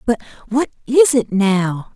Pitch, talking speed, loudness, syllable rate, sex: 230 Hz, 125 wpm, -17 LUFS, 3.7 syllables/s, female